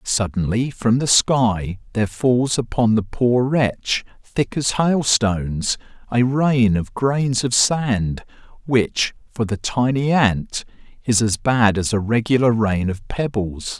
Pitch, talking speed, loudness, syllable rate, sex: 115 Hz, 145 wpm, -19 LUFS, 3.6 syllables/s, male